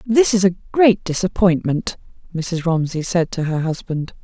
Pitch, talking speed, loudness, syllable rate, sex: 180 Hz, 155 wpm, -19 LUFS, 4.3 syllables/s, female